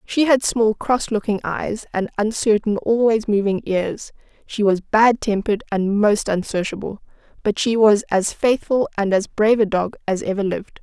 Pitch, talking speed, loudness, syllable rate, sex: 210 Hz, 170 wpm, -19 LUFS, 4.8 syllables/s, female